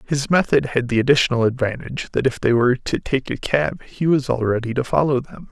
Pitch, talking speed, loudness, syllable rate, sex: 130 Hz, 230 wpm, -20 LUFS, 5.9 syllables/s, male